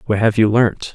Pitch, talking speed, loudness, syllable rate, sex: 110 Hz, 255 wpm, -16 LUFS, 5.1 syllables/s, male